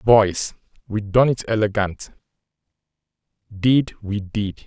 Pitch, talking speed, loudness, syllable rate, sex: 105 Hz, 105 wpm, -21 LUFS, 3.3 syllables/s, male